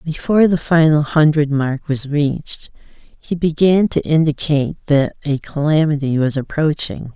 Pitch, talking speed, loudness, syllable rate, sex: 150 Hz, 135 wpm, -16 LUFS, 4.6 syllables/s, female